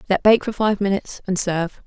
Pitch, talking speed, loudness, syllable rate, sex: 195 Hz, 225 wpm, -20 LUFS, 6.3 syllables/s, female